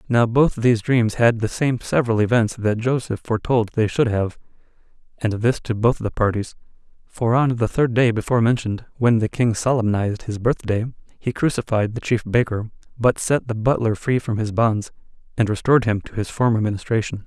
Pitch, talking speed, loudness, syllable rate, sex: 115 Hz, 190 wpm, -20 LUFS, 5.5 syllables/s, male